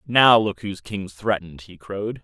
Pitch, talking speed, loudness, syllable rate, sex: 100 Hz, 190 wpm, -21 LUFS, 5.2 syllables/s, male